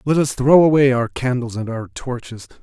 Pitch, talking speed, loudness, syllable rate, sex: 130 Hz, 205 wpm, -17 LUFS, 5.0 syllables/s, male